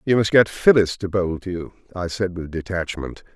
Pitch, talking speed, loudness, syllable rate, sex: 95 Hz, 215 wpm, -21 LUFS, 5.1 syllables/s, male